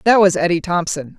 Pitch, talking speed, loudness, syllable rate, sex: 180 Hz, 205 wpm, -16 LUFS, 5.6 syllables/s, female